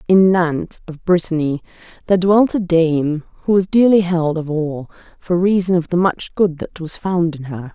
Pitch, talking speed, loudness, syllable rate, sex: 170 Hz, 195 wpm, -17 LUFS, 4.8 syllables/s, female